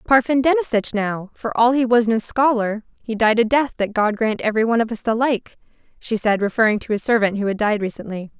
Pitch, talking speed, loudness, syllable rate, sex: 225 Hz, 230 wpm, -19 LUFS, 5.9 syllables/s, female